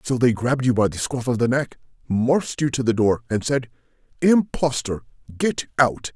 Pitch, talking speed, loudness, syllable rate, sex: 125 Hz, 195 wpm, -21 LUFS, 5.1 syllables/s, male